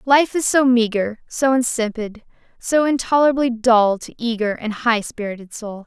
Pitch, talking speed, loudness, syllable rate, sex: 235 Hz, 155 wpm, -18 LUFS, 4.7 syllables/s, female